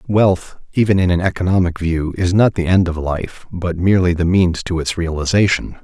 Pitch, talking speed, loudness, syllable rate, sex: 90 Hz, 195 wpm, -17 LUFS, 5.2 syllables/s, male